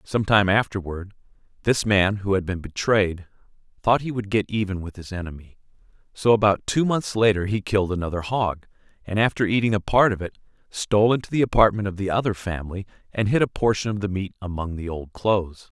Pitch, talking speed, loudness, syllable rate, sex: 100 Hz, 195 wpm, -23 LUFS, 5.9 syllables/s, male